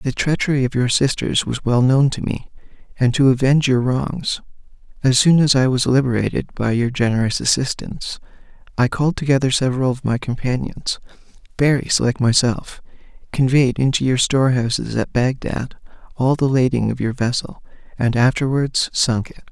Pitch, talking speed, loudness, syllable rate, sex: 130 Hz, 155 wpm, -18 LUFS, 5.2 syllables/s, male